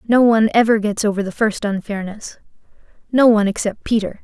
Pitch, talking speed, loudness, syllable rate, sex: 215 Hz, 170 wpm, -17 LUFS, 6.0 syllables/s, female